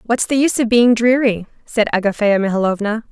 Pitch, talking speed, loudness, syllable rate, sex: 225 Hz, 175 wpm, -16 LUFS, 5.8 syllables/s, female